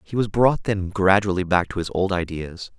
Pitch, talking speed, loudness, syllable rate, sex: 95 Hz, 215 wpm, -21 LUFS, 5.0 syllables/s, male